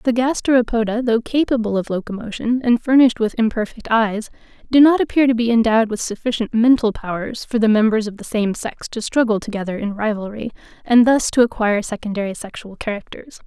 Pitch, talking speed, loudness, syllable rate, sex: 225 Hz, 180 wpm, -18 LUFS, 5.9 syllables/s, female